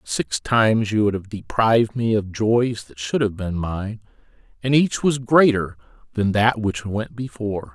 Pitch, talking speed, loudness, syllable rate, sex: 110 Hz, 180 wpm, -21 LUFS, 4.4 syllables/s, male